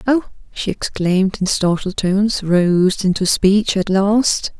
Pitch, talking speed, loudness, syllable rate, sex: 195 Hz, 145 wpm, -16 LUFS, 4.1 syllables/s, female